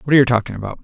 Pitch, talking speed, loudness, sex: 120 Hz, 360 wpm, -16 LUFS, male